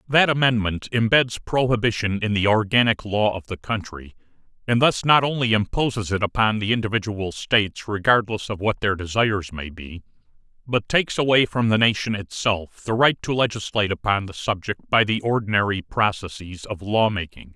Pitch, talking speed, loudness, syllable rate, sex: 105 Hz, 170 wpm, -21 LUFS, 5.3 syllables/s, male